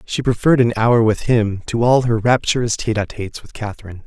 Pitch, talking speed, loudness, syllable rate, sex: 115 Hz, 220 wpm, -17 LUFS, 6.2 syllables/s, male